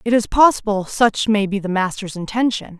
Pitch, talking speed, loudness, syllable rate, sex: 210 Hz, 195 wpm, -18 LUFS, 5.2 syllables/s, female